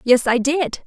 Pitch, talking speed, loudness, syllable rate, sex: 265 Hz, 210 wpm, -18 LUFS, 3.9 syllables/s, female